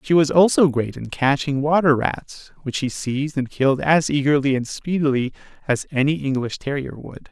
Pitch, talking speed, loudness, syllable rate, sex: 140 Hz, 180 wpm, -20 LUFS, 5.1 syllables/s, male